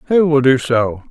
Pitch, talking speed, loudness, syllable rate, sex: 135 Hz, 220 wpm, -14 LUFS, 4.7 syllables/s, male